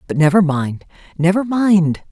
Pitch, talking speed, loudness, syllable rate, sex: 180 Hz, 140 wpm, -16 LUFS, 4.3 syllables/s, female